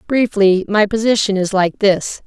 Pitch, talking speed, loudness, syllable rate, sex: 205 Hz, 160 wpm, -15 LUFS, 4.4 syllables/s, female